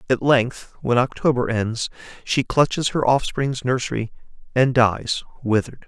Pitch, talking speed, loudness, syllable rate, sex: 125 Hz, 135 wpm, -21 LUFS, 4.6 syllables/s, male